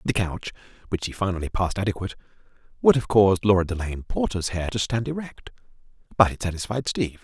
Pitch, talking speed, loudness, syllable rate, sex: 100 Hz, 175 wpm, -24 LUFS, 6.7 syllables/s, male